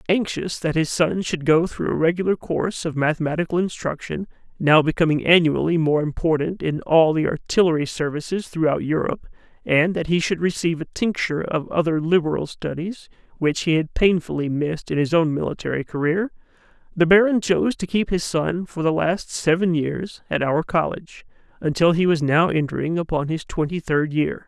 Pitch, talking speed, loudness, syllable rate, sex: 165 Hz, 175 wpm, -21 LUFS, 5.4 syllables/s, male